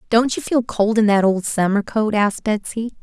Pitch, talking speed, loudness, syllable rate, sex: 215 Hz, 220 wpm, -18 LUFS, 5.0 syllables/s, female